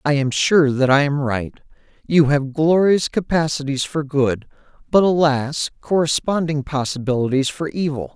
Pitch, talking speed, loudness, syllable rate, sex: 145 Hz, 140 wpm, -19 LUFS, 4.6 syllables/s, male